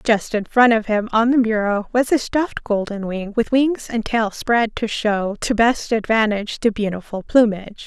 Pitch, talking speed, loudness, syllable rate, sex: 220 Hz, 200 wpm, -19 LUFS, 4.7 syllables/s, female